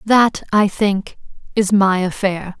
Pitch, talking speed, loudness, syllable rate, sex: 200 Hz, 140 wpm, -17 LUFS, 3.5 syllables/s, female